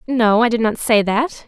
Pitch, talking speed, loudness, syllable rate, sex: 230 Hz, 245 wpm, -16 LUFS, 4.6 syllables/s, female